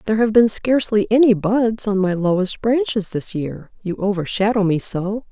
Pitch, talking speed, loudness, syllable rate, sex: 210 Hz, 180 wpm, -18 LUFS, 5.0 syllables/s, female